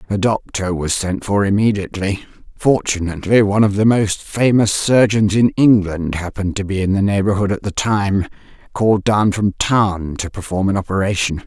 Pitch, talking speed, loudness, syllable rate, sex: 100 Hz, 160 wpm, -17 LUFS, 5.2 syllables/s, female